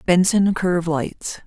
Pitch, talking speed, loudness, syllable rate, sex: 175 Hz, 125 wpm, -19 LUFS, 4.0 syllables/s, female